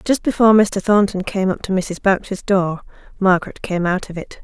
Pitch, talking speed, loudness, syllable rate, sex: 195 Hz, 205 wpm, -18 LUFS, 5.3 syllables/s, female